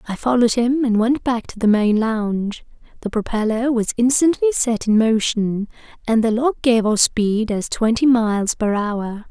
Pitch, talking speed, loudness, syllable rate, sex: 230 Hz, 180 wpm, -18 LUFS, 4.6 syllables/s, female